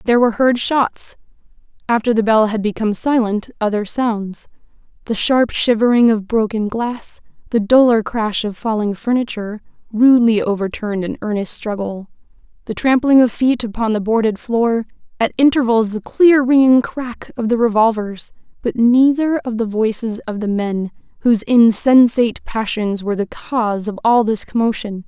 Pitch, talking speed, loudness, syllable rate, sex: 225 Hz, 145 wpm, -16 LUFS, 5.0 syllables/s, female